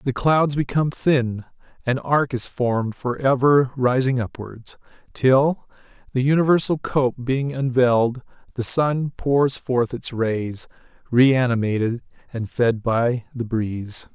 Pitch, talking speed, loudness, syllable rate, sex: 125 Hz, 130 wpm, -21 LUFS, 4.0 syllables/s, male